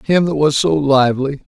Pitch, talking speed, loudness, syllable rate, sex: 145 Hz, 195 wpm, -15 LUFS, 4.9 syllables/s, male